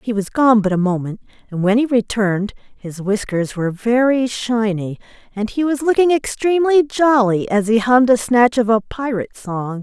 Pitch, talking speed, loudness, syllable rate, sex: 230 Hz, 185 wpm, -17 LUFS, 5.1 syllables/s, female